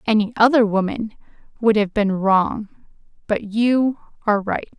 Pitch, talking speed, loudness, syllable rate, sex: 215 Hz, 140 wpm, -19 LUFS, 4.3 syllables/s, female